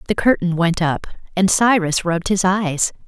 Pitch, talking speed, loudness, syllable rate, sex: 180 Hz, 175 wpm, -18 LUFS, 4.8 syllables/s, female